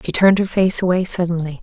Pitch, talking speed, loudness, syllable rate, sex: 175 Hz, 220 wpm, -17 LUFS, 6.5 syllables/s, female